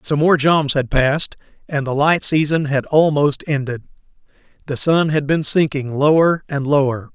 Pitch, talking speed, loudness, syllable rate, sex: 145 Hz, 170 wpm, -17 LUFS, 4.6 syllables/s, male